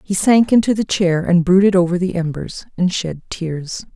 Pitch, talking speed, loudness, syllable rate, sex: 180 Hz, 195 wpm, -16 LUFS, 4.7 syllables/s, female